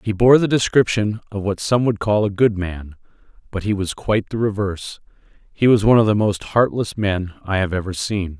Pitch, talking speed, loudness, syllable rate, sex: 100 Hz, 215 wpm, -19 LUFS, 5.4 syllables/s, male